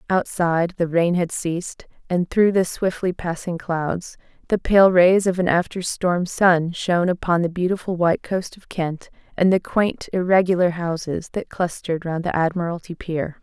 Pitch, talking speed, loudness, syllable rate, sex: 175 Hz, 170 wpm, -21 LUFS, 4.7 syllables/s, female